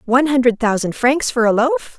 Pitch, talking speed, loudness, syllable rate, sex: 245 Hz, 210 wpm, -16 LUFS, 5.4 syllables/s, female